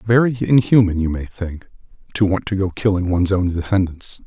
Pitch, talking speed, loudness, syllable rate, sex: 95 Hz, 185 wpm, -18 LUFS, 5.4 syllables/s, male